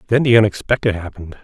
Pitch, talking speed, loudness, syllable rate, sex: 105 Hz, 165 wpm, -16 LUFS, 7.7 syllables/s, male